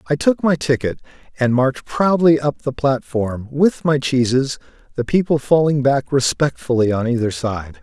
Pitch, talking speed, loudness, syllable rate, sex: 135 Hz, 160 wpm, -18 LUFS, 4.7 syllables/s, male